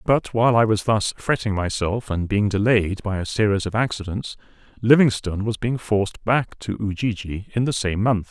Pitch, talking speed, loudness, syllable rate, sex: 105 Hz, 190 wpm, -21 LUFS, 5.1 syllables/s, male